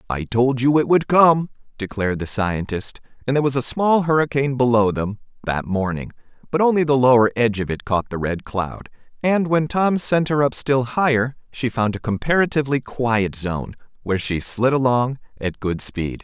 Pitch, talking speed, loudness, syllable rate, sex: 125 Hz, 190 wpm, -20 LUFS, 5.1 syllables/s, male